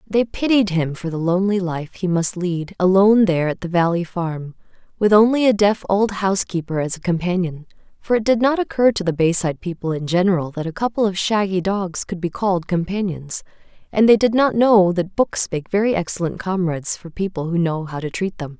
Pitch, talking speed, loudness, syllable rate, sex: 185 Hz, 210 wpm, -19 LUFS, 5.6 syllables/s, female